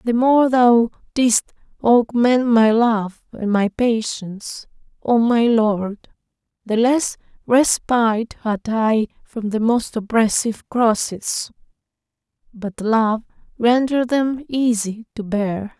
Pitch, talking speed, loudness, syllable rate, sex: 230 Hz, 115 wpm, -18 LUFS, 3.5 syllables/s, female